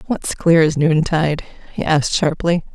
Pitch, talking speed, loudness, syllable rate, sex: 160 Hz, 155 wpm, -17 LUFS, 5.0 syllables/s, female